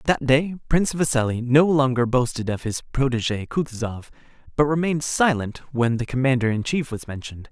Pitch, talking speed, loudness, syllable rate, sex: 130 Hz, 170 wpm, -22 LUFS, 5.8 syllables/s, male